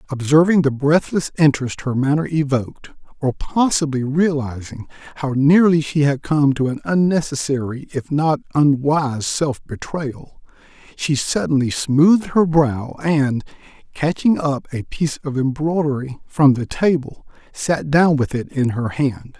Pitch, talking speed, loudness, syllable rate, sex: 145 Hz, 140 wpm, -18 LUFS, 4.4 syllables/s, male